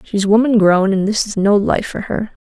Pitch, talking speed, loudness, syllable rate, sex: 205 Hz, 245 wpm, -15 LUFS, 4.8 syllables/s, female